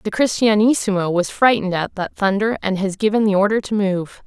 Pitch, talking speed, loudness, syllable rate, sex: 200 Hz, 195 wpm, -18 LUFS, 5.5 syllables/s, female